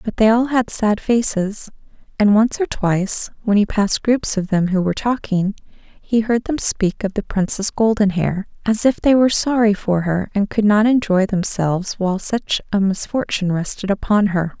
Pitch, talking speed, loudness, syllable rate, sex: 210 Hz, 190 wpm, -18 LUFS, 4.9 syllables/s, female